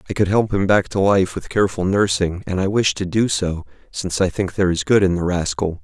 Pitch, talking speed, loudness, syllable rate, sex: 95 Hz, 255 wpm, -19 LUFS, 5.8 syllables/s, male